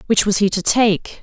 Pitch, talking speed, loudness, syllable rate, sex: 205 Hz, 245 wpm, -16 LUFS, 4.7 syllables/s, female